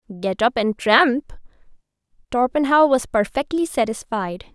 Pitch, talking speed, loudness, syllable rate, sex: 245 Hz, 105 wpm, -20 LUFS, 4.5 syllables/s, female